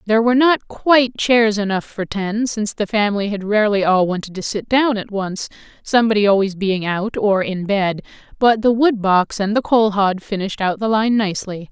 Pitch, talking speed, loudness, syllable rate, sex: 210 Hz, 205 wpm, -17 LUFS, 5.3 syllables/s, female